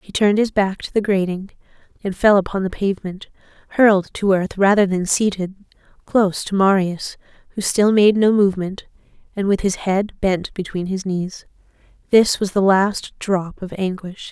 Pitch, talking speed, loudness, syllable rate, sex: 195 Hz, 170 wpm, -19 LUFS, 4.9 syllables/s, female